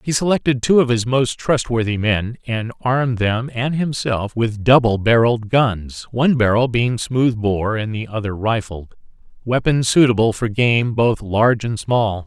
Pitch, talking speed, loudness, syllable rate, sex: 115 Hz, 165 wpm, -18 LUFS, 4.4 syllables/s, male